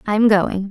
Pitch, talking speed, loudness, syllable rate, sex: 205 Hz, 255 wpm, -16 LUFS, 5.1 syllables/s, female